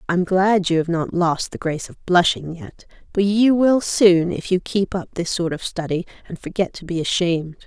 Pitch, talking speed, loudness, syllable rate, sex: 180 Hz, 220 wpm, -20 LUFS, 4.9 syllables/s, female